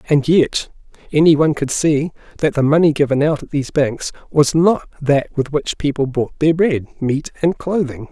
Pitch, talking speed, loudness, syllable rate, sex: 150 Hz, 190 wpm, -17 LUFS, 4.9 syllables/s, male